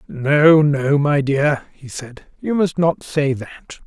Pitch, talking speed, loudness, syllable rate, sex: 145 Hz, 170 wpm, -17 LUFS, 3.2 syllables/s, male